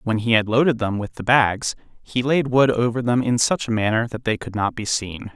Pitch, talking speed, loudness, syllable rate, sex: 115 Hz, 260 wpm, -20 LUFS, 5.4 syllables/s, male